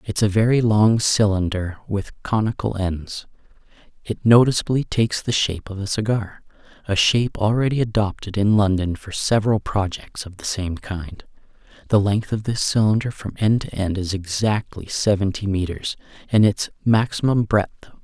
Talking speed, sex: 170 wpm, male